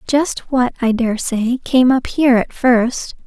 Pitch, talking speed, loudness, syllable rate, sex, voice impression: 245 Hz, 185 wpm, -16 LUFS, 3.7 syllables/s, female, feminine, young, slightly relaxed, powerful, bright, soft, cute, calm, friendly, reassuring, slightly lively, kind